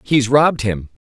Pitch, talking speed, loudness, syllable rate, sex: 125 Hz, 160 wpm, -16 LUFS, 4.9 syllables/s, male